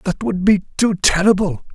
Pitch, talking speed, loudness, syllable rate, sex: 190 Hz, 170 wpm, -17 LUFS, 5.0 syllables/s, male